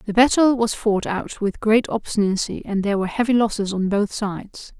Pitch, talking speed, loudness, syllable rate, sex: 210 Hz, 200 wpm, -20 LUFS, 5.5 syllables/s, female